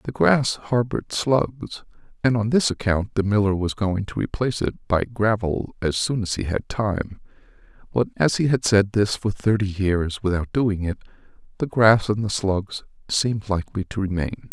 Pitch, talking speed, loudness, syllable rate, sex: 105 Hz, 180 wpm, -22 LUFS, 4.7 syllables/s, male